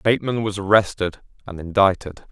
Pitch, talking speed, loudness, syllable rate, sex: 100 Hz, 130 wpm, -20 LUFS, 5.5 syllables/s, male